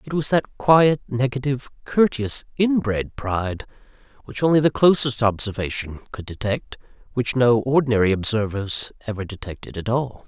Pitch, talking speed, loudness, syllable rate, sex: 120 Hz, 135 wpm, -21 LUFS, 5.0 syllables/s, male